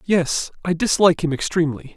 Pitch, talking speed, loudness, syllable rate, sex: 165 Hz, 155 wpm, -20 LUFS, 5.8 syllables/s, male